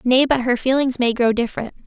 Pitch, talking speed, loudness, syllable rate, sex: 250 Hz, 225 wpm, -18 LUFS, 6.1 syllables/s, female